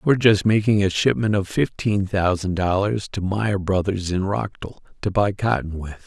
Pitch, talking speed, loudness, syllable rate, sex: 100 Hz, 180 wpm, -21 LUFS, 4.7 syllables/s, male